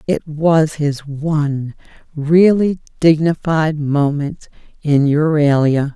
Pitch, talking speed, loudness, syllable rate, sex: 150 Hz, 90 wpm, -16 LUFS, 3.3 syllables/s, female